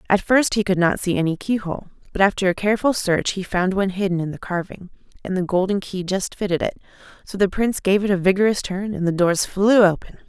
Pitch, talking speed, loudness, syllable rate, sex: 190 Hz, 235 wpm, -20 LUFS, 6.1 syllables/s, female